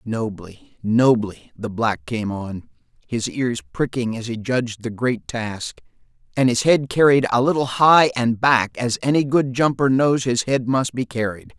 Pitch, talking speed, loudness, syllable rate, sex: 120 Hz, 175 wpm, -20 LUFS, 4.2 syllables/s, male